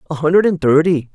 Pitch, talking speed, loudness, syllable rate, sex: 160 Hz, 210 wpm, -14 LUFS, 6.7 syllables/s, male